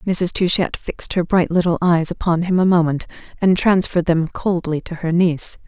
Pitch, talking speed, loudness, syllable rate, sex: 175 Hz, 190 wpm, -18 LUFS, 5.1 syllables/s, female